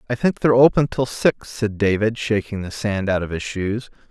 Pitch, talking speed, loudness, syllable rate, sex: 110 Hz, 220 wpm, -20 LUFS, 5.1 syllables/s, male